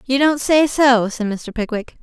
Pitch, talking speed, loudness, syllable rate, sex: 250 Hz, 205 wpm, -17 LUFS, 4.2 syllables/s, female